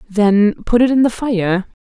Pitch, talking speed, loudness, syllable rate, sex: 220 Hz, 195 wpm, -15 LUFS, 4.0 syllables/s, female